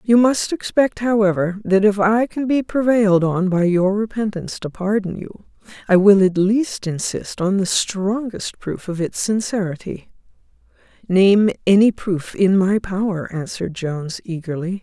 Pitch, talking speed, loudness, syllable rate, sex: 200 Hz, 155 wpm, -18 LUFS, 4.5 syllables/s, female